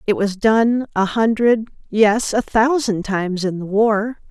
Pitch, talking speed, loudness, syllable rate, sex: 215 Hz, 165 wpm, -18 LUFS, 4.0 syllables/s, female